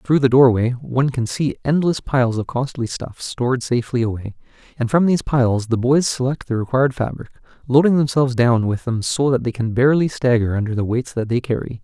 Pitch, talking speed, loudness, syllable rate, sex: 125 Hz, 210 wpm, -19 LUFS, 5.9 syllables/s, male